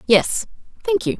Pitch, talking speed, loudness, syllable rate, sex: 270 Hz, 150 wpm, -20 LUFS, 4.6 syllables/s, female